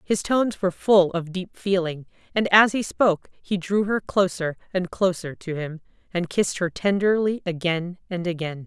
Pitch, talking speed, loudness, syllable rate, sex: 185 Hz, 180 wpm, -23 LUFS, 4.8 syllables/s, female